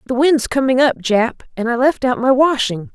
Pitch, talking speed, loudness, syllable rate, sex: 250 Hz, 225 wpm, -16 LUFS, 5.1 syllables/s, female